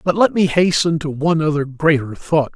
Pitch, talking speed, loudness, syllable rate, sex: 160 Hz, 210 wpm, -17 LUFS, 5.4 syllables/s, male